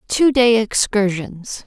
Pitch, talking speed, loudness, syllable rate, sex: 215 Hz, 110 wpm, -16 LUFS, 3.3 syllables/s, female